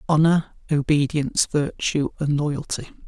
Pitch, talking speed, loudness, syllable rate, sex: 150 Hz, 100 wpm, -22 LUFS, 4.3 syllables/s, male